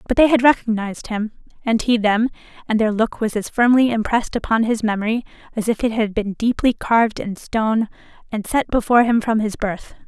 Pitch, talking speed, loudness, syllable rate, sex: 225 Hz, 205 wpm, -19 LUFS, 5.7 syllables/s, female